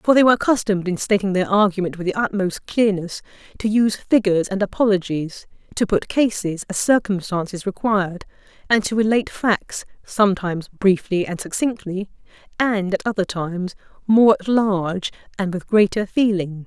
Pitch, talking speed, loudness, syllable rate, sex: 200 Hz, 150 wpm, -20 LUFS, 5.3 syllables/s, female